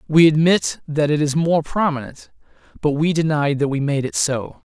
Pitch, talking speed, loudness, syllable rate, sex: 150 Hz, 190 wpm, -19 LUFS, 4.8 syllables/s, male